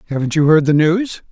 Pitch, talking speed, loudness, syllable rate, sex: 160 Hz, 225 wpm, -14 LUFS, 5.8 syllables/s, male